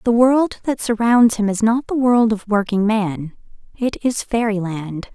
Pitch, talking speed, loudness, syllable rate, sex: 220 Hz, 185 wpm, -18 LUFS, 4.2 syllables/s, female